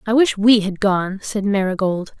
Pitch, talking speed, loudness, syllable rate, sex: 205 Hz, 190 wpm, -18 LUFS, 4.5 syllables/s, female